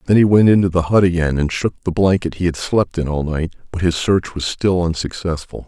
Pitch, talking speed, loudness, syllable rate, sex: 85 Hz, 245 wpm, -17 LUFS, 5.6 syllables/s, male